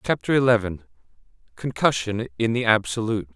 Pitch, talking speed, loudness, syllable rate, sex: 115 Hz, 90 wpm, -22 LUFS, 5.9 syllables/s, male